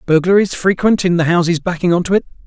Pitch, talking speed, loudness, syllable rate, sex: 180 Hz, 220 wpm, -14 LUFS, 6.5 syllables/s, male